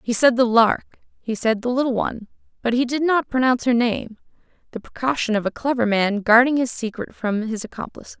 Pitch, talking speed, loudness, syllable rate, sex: 240 Hz, 200 wpm, -20 LUFS, 5.8 syllables/s, female